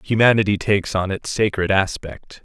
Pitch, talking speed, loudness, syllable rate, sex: 100 Hz, 150 wpm, -19 LUFS, 5.2 syllables/s, male